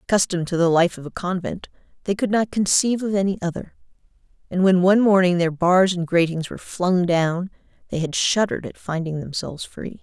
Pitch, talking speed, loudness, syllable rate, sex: 180 Hz, 190 wpm, -21 LUFS, 5.8 syllables/s, female